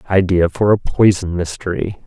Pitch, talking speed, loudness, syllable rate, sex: 95 Hz, 145 wpm, -16 LUFS, 4.9 syllables/s, male